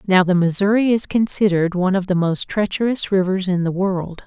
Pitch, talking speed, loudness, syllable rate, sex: 190 Hz, 195 wpm, -18 LUFS, 5.6 syllables/s, female